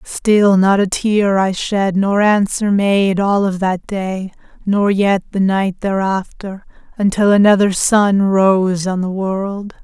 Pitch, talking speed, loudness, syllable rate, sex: 195 Hz, 155 wpm, -15 LUFS, 3.5 syllables/s, female